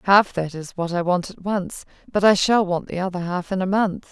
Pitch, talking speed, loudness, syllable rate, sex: 185 Hz, 260 wpm, -21 LUFS, 5.2 syllables/s, female